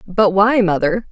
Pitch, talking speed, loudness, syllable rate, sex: 200 Hz, 160 wpm, -15 LUFS, 4.1 syllables/s, female